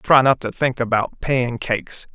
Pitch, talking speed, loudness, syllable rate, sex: 125 Hz, 170 wpm, -20 LUFS, 4.4 syllables/s, male